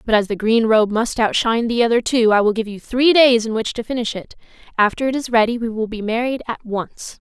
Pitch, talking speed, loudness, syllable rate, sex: 230 Hz, 255 wpm, -18 LUFS, 5.8 syllables/s, female